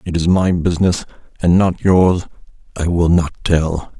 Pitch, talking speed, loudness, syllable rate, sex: 85 Hz, 165 wpm, -16 LUFS, 4.7 syllables/s, male